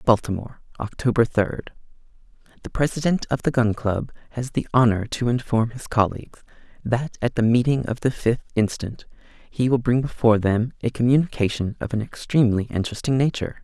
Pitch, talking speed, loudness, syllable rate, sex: 120 Hz, 160 wpm, -22 LUFS, 5.7 syllables/s, male